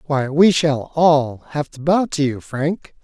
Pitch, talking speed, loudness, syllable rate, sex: 150 Hz, 195 wpm, -18 LUFS, 3.7 syllables/s, male